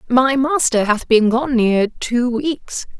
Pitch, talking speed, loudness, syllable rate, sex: 245 Hz, 160 wpm, -16 LUFS, 3.5 syllables/s, female